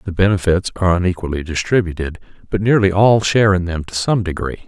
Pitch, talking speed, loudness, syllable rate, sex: 90 Hz, 180 wpm, -17 LUFS, 6.3 syllables/s, male